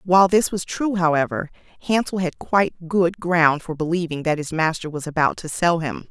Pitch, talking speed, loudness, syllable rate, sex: 170 Hz, 195 wpm, -21 LUFS, 5.3 syllables/s, female